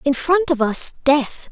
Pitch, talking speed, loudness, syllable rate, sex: 285 Hz, 200 wpm, -17 LUFS, 3.9 syllables/s, female